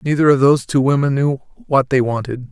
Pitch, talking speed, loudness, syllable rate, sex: 140 Hz, 215 wpm, -16 LUFS, 6.1 syllables/s, male